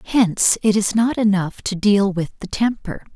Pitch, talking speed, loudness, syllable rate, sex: 205 Hz, 190 wpm, -18 LUFS, 4.5 syllables/s, female